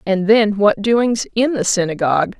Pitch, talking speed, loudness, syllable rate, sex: 205 Hz, 175 wpm, -16 LUFS, 4.6 syllables/s, female